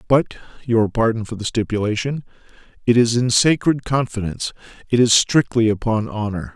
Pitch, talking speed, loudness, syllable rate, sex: 115 Hz, 145 wpm, -19 LUFS, 4.3 syllables/s, male